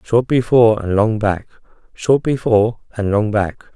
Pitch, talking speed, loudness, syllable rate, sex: 110 Hz, 160 wpm, -16 LUFS, 4.8 syllables/s, male